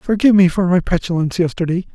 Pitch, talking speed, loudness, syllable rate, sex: 180 Hz, 185 wpm, -16 LUFS, 7.0 syllables/s, male